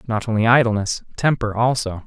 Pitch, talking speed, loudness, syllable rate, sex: 115 Hz, 145 wpm, -19 LUFS, 5.6 syllables/s, male